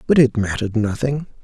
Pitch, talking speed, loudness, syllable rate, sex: 120 Hz, 165 wpm, -19 LUFS, 6.0 syllables/s, male